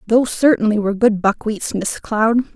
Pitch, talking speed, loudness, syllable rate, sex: 220 Hz, 165 wpm, -17 LUFS, 5.3 syllables/s, female